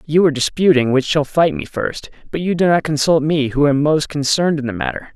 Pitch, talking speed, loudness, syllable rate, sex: 150 Hz, 245 wpm, -16 LUFS, 5.8 syllables/s, male